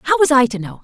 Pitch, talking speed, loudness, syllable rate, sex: 245 Hz, 360 wpm, -15 LUFS, 6.3 syllables/s, female